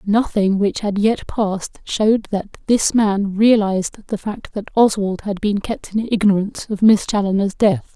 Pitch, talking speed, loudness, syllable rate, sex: 205 Hz, 175 wpm, -18 LUFS, 4.6 syllables/s, female